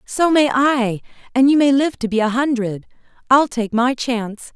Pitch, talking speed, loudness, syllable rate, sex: 250 Hz, 185 wpm, -17 LUFS, 4.6 syllables/s, female